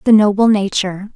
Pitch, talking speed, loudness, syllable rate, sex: 205 Hz, 155 wpm, -14 LUFS, 5.8 syllables/s, female